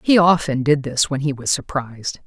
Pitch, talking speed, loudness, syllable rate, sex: 145 Hz, 210 wpm, -19 LUFS, 5.1 syllables/s, female